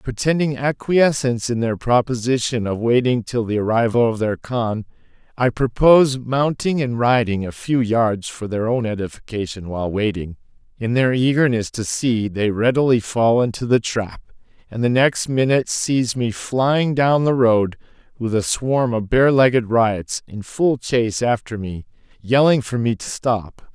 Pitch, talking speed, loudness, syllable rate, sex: 120 Hz, 165 wpm, -19 LUFS, 4.5 syllables/s, male